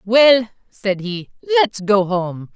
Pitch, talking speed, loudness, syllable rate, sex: 215 Hz, 140 wpm, -17 LUFS, 3.1 syllables/s, female